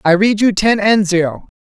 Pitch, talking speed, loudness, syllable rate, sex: 195 Hz, 220 wpm, -13 LUFS, 5.0 syllables/s, female